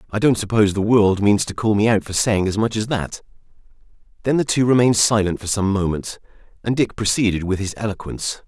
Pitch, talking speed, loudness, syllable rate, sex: 105 Hz, 210 wpm, -19 LUFS, 6.1 syllables/s, male